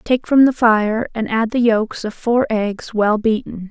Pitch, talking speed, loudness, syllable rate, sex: 225 Hz, 210 wpm, -17 LUFS, 4.0 syllables/s, female